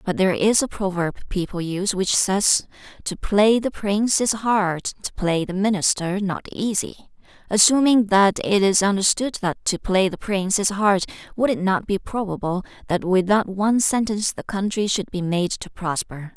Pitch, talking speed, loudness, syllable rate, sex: 195 Hz, 185 wpm, -21 LUFS, 4.9 syllables/s, female